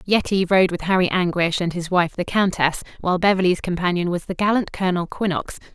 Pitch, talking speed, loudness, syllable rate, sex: 180 Hz, 190 wpm, -20 LUFS, 6.1 syllables/s, female